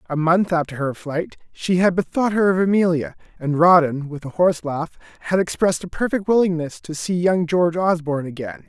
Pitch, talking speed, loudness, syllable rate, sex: 170 Hz, 195 wpm, -20 LUFS, 5.5 syllables/s, male